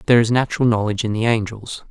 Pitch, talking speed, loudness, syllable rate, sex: 110 Hz, 250 wpm, -19 LUFS, 7.6 syllables/s, male